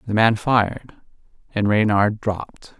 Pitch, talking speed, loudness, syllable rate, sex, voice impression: 110 Hz, 130 wpm, -20 LUFS, 4.5 syllables/s, male, masculine, adult-like, slightly muffled, slightly cool, sincere, calm